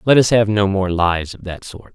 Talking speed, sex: 280 wpm, male